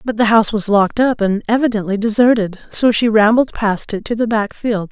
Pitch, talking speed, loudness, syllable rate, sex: 220 Hz, 220 wpm, -15 LUFS, 5.5 syllables/s, female